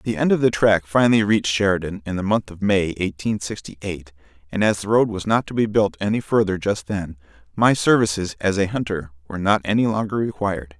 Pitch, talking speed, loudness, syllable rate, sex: 100 Hz, 215 wpm, -20 LUFS, 5.8 syllables/s, male